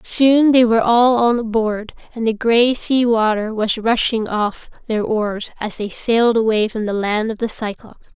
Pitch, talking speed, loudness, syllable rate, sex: 225 Hz, 190 wpm, -17 LUFS, 4.4 syllables/s, female